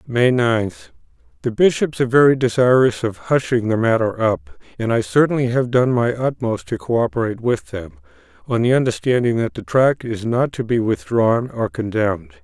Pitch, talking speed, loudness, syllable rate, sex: 120 Hz, 170 wpm, -18 LUFS, 5.1 syllables/s, male